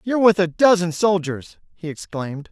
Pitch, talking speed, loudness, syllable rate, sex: 180 Hz, 165 wpm, -19 LUFS, 5.3 syllables/s, male